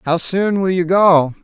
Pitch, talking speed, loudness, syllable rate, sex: 180 Hz, 210 wpm, -15 LUFS, 4.0 syllables/s, male